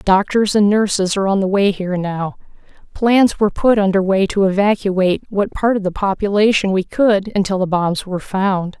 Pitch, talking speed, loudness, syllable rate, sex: 200 Hz, 190 wpm, -16 LUFS, 5.2 syllables/s, female